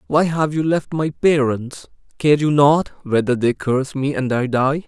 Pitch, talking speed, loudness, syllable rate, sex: 140 Hz, 195 wpm, -18 LUFS, 4.3 syllables/s, male